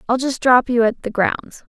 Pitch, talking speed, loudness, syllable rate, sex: 240 Hz, 240 wpm, -17 LUFS, 5.9 syllables/s, female